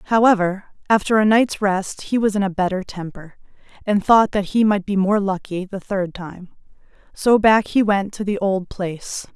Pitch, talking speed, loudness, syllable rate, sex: 200 Hz, 190 wpm, -19 LUFS, 4.7 syllables/s, female